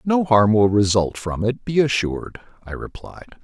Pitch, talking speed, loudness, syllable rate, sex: 115 Hz, 175 wpm, -18 LUFS, 4.8 syllables/s, male